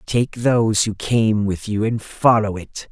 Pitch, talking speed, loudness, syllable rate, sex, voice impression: 110 Hz, 185 wpm, -19 LUFS, 4.0 syllables/s, male, masculine, adult-like, powerful, hard, clear, slightly halting, raspy, cool, slightly mature, wild, strict, slightly intense, sharp